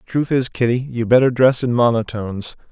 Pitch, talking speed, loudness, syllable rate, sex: 120 Hz, 175 wpm, -17 LUFS, 5.4 syllables/s, male